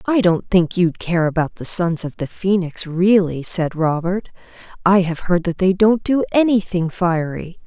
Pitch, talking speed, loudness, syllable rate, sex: 180 Hz, 180 wpm, -18 LUFS, 4.3 syllables/s, female